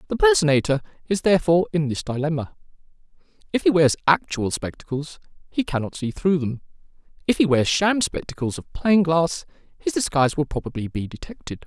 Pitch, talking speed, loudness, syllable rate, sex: 165 Hz, 160 wpm, -22 LUFS, 5.8 syllables/s, male